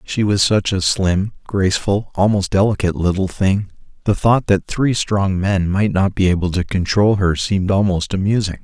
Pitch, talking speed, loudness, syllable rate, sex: 95 Hz, 180 wpm, -17 LUFS, 4.9 syllables/s, male